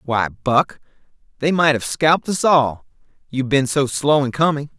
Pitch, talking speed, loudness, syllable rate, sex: 140 Hz, 175 wpm, -18 LUFS, 4.6 syllables/s, male